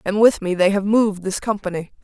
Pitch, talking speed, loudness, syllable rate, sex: 200 Hz, 235 wpm, -19 LUFS, 6.0 syllables/s, female